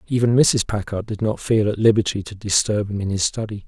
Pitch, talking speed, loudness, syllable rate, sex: 105 Hz, 230 wpm, -20 LUFS, 5.7 syllables/s, male